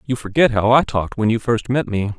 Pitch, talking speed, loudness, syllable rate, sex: 115 Hz, 275 wpm, -18 LUFS, 5.8 syllables/s, male